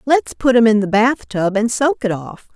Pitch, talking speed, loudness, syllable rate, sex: 230 Hz, 260 wpm, -16 LUFS, 4.6 syllables/s, female